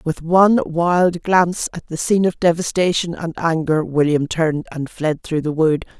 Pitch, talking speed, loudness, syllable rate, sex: 165 Hz, 180 wpm, -18 LUFS, 4.8 syllables/s, female